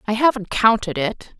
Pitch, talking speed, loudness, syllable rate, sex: 215 Hz, 170 wpm, -19 LUFS, 4.9 syllables/s, female